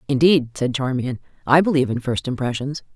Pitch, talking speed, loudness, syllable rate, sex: 135 Hz, 165 wpm, -20 LUFS, 5.8 syllables/s, female